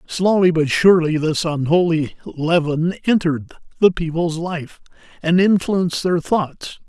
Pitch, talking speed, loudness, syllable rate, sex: 170 Hz, 120 wpm, -18 LUFS, 4.2 syllables/s, male